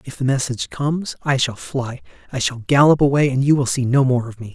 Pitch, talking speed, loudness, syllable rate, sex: 135 Hz, 250 wpm, -18 LUFS, 5.9 syllables/s, male